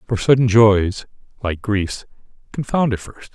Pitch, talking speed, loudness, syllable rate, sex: 110 Hz, 145 wpm, -18 LUFS, 4.2 syllables/s, male